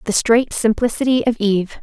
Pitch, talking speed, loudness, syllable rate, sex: 230 Hz, 165 wpm, -17 LUFS, 5.3 syllables/s, female